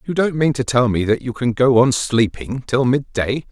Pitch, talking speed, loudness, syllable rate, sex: 125 Hz, 255 wpm, -18 LUFS, 4.8 syllables/s, male